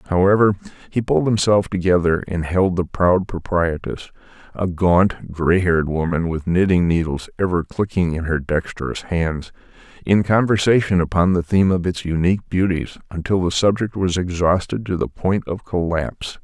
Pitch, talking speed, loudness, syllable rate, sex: 90 Hz, 155 wpm, -19 LUFS, 4.9 syllables/s, male